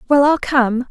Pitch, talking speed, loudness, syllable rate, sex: 265 Hz, 200 wpm, -15 LUFS, 4.2 syllables/s, female